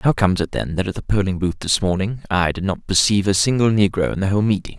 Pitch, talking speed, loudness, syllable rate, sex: 100 Hz, 275 wpm, -19 LUFS, 6.7 syllables/s, male